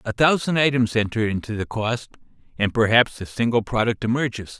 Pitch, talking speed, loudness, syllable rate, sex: 115 Hz, 170 wpm, -21 LUFS, 5.4 syllables/s, male